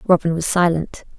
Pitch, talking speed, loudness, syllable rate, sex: 175 Hz, 150 wpm, -18 LUFS, 5.1 syllables/s, female